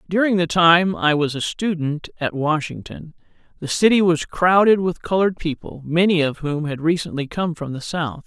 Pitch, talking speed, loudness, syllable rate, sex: 165 Hz, 180 wpm, -19 LUFS, 4.9 syllables/s, male